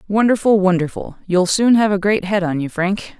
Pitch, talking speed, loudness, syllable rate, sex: 195 Hz, 205 wpm, -17 LUFS, 5.1 syllables/s, female